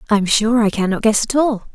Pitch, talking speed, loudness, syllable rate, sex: 220 Hz, 275 wpm, -16 LUFS, 6.0 syllables/s, female